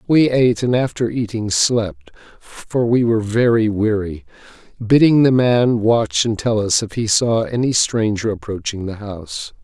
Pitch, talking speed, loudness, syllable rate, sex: 110 Hz, 160 wpm, -17 LUFS, 4.4 syllables/s, male